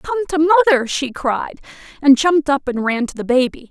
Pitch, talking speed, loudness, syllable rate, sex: 285 Hz, 210 wpm, -16 LUFS, 5.3 syllables/s, female